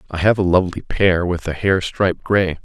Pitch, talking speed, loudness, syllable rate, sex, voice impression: 90 Hz, 225 wpm, -18 LUFS, 5.6 syllables/s, male, very masculine, very adult-like, thick, cool, calm, wild